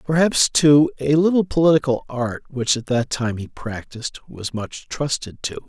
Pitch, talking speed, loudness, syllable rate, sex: 135 Hz, 170 wpm, -20 LUFS, 4.7 syllables/s, male